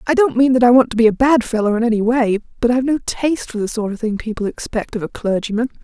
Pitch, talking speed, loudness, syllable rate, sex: 235 Hz, 290 wpm, -17 LUFS, 6.7 syllables/s, female